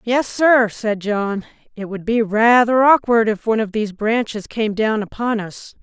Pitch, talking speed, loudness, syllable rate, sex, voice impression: 220 Hz, 185 wpm, -17 LUFS, 4.5 syllables/s, female, feminine, adult-like, tensed, powerful, slightly hard, clear, slightly raspy, slightly friendly, lively, slightly strict, intense, slightly sharp